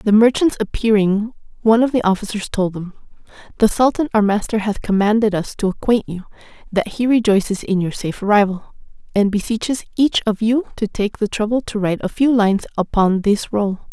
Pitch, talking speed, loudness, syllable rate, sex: 215 Hz, 185 wpm, -18 LUFS, 5.6 syllables/s, female